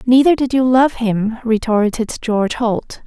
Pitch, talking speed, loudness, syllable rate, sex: 235 Hz, 155 wpm, -16 LUFS, 4.3 syllables/s, female